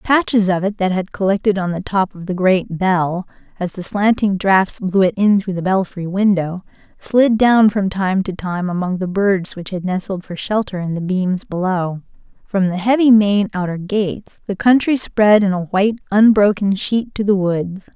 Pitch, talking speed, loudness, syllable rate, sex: 195 Hz, 195 wpm, -17 LUFS, 4.6 syllables/s, female